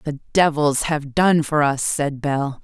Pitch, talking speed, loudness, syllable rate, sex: 145 Hz, 180 wpm, -19 LUFS, 3.5 syllables/s, female